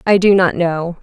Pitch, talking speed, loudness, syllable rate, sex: 180 Hz, 235 wpm, -14 LUFS, 4.4 syllables/s, female